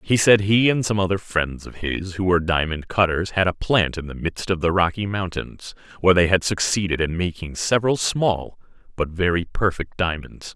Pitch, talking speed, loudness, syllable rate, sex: 90 Hz, 200 wpm, -21 LUFS, 5.1 syllables/s, male